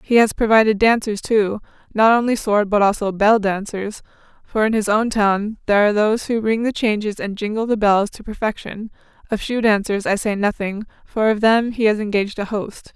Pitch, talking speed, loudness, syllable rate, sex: 215 Hz, 205 wpm, -18 LUFS, 5.3 syllables/s, female